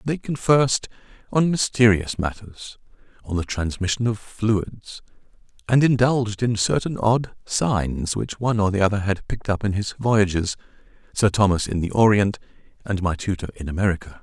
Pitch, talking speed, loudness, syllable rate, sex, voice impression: 105 Hz, 150 wpm, -22 LUFS, 5.0 syllables/s, male, masculine, middle-aged, slightly relaxed, slightly halting, raspy, cool, sincere, calm, slightly mature, wild, kind, modest